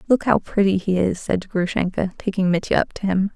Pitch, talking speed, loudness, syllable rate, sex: 195 Hz, 215 wpm, -21 LUFS, 5.5 syllables/s, female